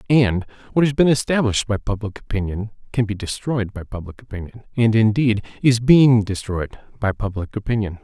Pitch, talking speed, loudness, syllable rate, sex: 110 Hz, 155 wpm, -20 LUFS, 5.4 syllables/s, male